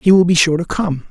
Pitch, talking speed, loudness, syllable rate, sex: 170 Hz, 325 wpm, -14 LUFS, 5.7 syllables/s, male